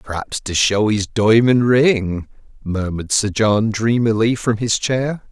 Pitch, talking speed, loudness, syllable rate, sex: 110 Hz, 145 wpm, -17 LUFS, 3.9 syllables/s, male